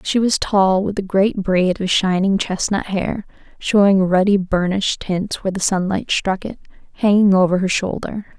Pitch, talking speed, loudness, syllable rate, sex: 195 Hz, 170 wpm, -18 LUFS, 4.7 syllables/s, female